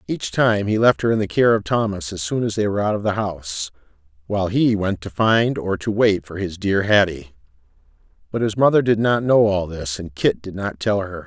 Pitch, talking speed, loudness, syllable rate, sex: 110 Hz, 240 wpm, -20 LUFS, 5.3 syllables/s, male